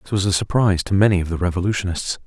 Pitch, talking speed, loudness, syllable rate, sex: 95 Hz, 240 wpm, -19 LUFS, 7.3 syllables/s, male